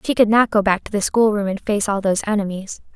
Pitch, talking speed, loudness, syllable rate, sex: 205 Hz, 265 wpm, -18 LUFS, 6.4 syllables/s, female